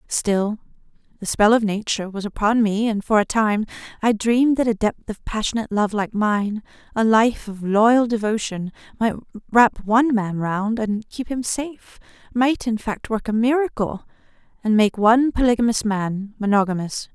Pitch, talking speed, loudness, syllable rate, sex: 220 Hz, 160 wpm, -20 LUFS, 4.7 syllables/s, female